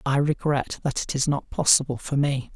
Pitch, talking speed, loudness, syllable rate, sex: 140 Hz, 210 wpm, -23 LUFS, 5.1 syllables/s, male